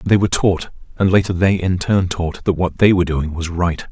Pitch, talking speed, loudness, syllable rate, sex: 90 Hz, 245 wpm, -17 LUFS, 5.4 syllables/s, male